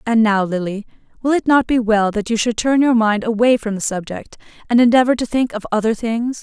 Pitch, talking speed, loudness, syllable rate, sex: 225 Hz, 235 wpm, -17 LUFS, 5.4 syllables/s, female